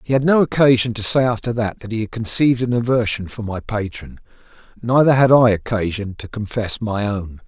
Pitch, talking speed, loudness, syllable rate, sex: 115 Hz, 200 wpm, -18 LUFS, 5.5 syllables/s, male